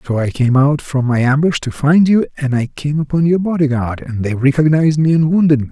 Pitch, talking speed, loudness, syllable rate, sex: 145 Hz, 240 wpm, -14 LUFS, 5.8 syllables/s, male